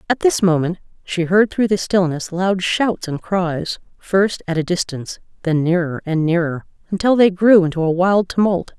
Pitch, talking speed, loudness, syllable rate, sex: 180 Hz, 185 wpm, -18 LUFS, 4.7 syllables/s, female